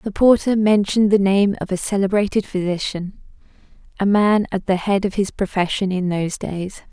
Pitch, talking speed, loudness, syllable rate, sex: 195 Hz, 165 wpm, -19 LUFS, 5.3 syllables/s, female